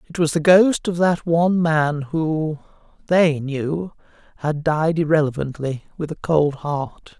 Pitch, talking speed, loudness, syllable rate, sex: 155 Hz, 135 wpm, -20 LUFS, 3.9 syllables/s, male